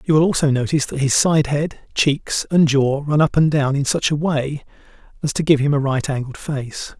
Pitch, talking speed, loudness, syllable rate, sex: 145 Hz, 230 wpm, -18 LUFS, 5.0 syllables/s, male